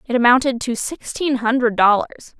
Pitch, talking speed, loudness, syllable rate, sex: 240 Hz, 150 wpm, -18 LUFS, 5.6 syllables/s, female